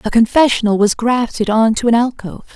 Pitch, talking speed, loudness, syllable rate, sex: 230 Hz, 190 wpm, -14 LUFS, 5.9 syllables/s, female